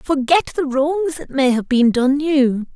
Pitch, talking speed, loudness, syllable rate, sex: 280 Hz, 195 wpm, -17 LUFS, 4.0 syllables/s, female